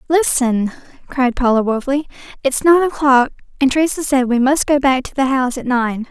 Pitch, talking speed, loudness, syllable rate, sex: 265 Hz, 185 wpm, -16 LUFS, 5.5 syllables/s, female